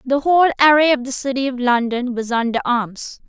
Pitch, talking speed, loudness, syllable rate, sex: 260 Hz, 200 wpm, -17 LUFS, 5.4 syllables/s, female